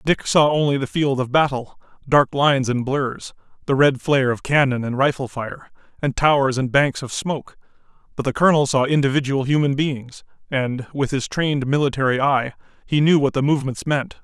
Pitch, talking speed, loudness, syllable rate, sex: 135 Hz, 185 wpm, -20 LUFS, 5.4 syllables/s, male